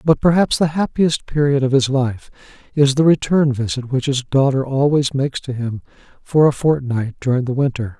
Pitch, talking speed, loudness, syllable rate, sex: 135 Hz, 190 wpm, -17 LUFS, 5.1 syllables/s, male